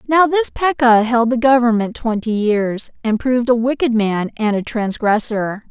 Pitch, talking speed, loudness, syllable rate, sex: 235 Hz, 170 wpm, -16 LUFS, 4.5 syllables/s, female